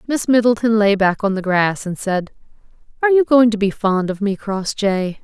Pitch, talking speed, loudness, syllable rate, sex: 210 Hz, 205 wpm, -17 LUFS, 5.0 syllables/s, female